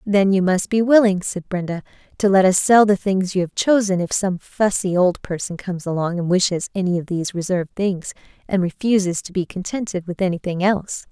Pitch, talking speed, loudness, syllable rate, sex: 185 Hz, 205 wpm, -19 LUFS, 5.6 syllables/s, female